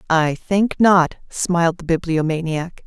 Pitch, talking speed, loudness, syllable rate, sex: 170 Hz, 125 wpm, -18 LUFS, 4.1 syllables/s, female